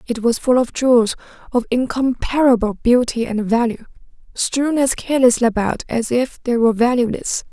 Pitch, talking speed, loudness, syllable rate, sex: 240 Hz, 150 wpm, -17 LUFS, 5.2 syllables/s, female